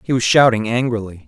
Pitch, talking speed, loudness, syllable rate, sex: 115 Hz, 190 wpm, -16 LUFS, 6.0 syllables/s, male